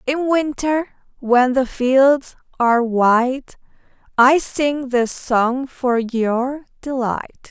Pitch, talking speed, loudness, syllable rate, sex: 260 Hz, 110 wpm, -18 LUFS, 3.2 syllables/s, female